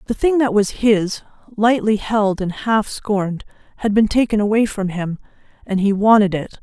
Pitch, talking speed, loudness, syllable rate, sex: 210 Hz, 180 wpm, -18 LUFS, 4.8 syllables/s, female